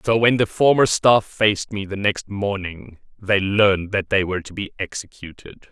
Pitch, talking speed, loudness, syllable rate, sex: 100 Hz, 190 wpm, -19 LUFS, 4.9 syllables/s, male